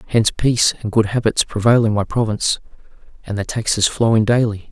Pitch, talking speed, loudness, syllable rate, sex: 110 Hz, 190 wpm, -17 LUFS, 6.0 syllables/s, male